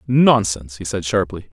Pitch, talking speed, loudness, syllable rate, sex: 100 Hz, 150 wpm, -19 LUFS, 5.2 syllables/s, male